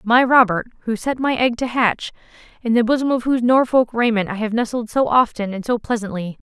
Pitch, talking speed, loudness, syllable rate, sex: 230 Hz, 195 wpm, -18 LUFS, 5.7 syllables/s, female